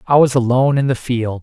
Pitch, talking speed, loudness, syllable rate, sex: 130 Hz, 255 wpm, -15 LUFS, 6.0 syllables/s, male